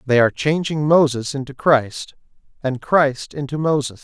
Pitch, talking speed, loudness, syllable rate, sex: 140 Hz, 150 wpm, -19 LUFS, 4.6 syllables/s, male